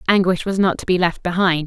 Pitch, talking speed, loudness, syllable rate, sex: 180 Hz, 255 wpm, -18 LUFS, 5.8 syllables/s, female